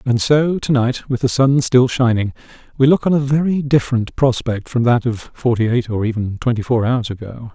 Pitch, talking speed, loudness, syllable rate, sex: 125 Hz, 215 wpm, -17 LUFS, 5.2 syllables/s, male